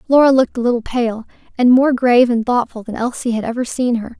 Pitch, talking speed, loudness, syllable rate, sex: 240 Hz, 230 wpm, -16 LUFS, 6.2 syllables/s, female